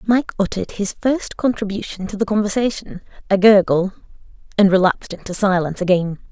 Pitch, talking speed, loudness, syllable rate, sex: 200 Hz, 125 wpm, -18 LUFS, 5.8 syllables/s, female